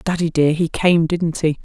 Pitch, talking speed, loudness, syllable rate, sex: 165 Hz, 220 wpm, -17 LUFS, 4.6 syllables/s, female